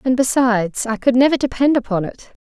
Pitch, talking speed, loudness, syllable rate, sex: 245 Hz, 195 wpm, -17 LUFS, 5.8 syllables/s, female